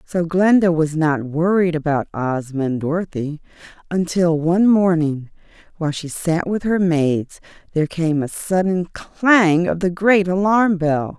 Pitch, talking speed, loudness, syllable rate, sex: 170 Hz, 150 wpm, -18 LUFS, 4.3 syllables/s, female